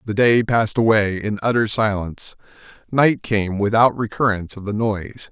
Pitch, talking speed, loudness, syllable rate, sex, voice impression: 105 Hz, 145 wpm, -19 LUFS, 5.3 syllables/s, male, very masculine, old, very thick, tensed, very powerful, bright, soft, very clear, fluent, halting, very cool, intellectual, slightly refreshing, sincere, very calm, very mature, friendly, reassuring, very unique, elegant, very wild, sweet, slightly lively, kind, slightly intense